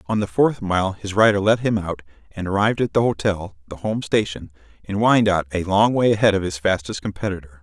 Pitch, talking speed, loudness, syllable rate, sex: 100 Hz, 195 wpm, -20 LUFS, 5.8 syllables/s, male